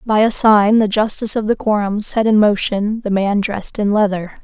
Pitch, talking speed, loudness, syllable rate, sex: 210 Hz, 215 wpm, -15 LUFS, 5.1 syllables/s, female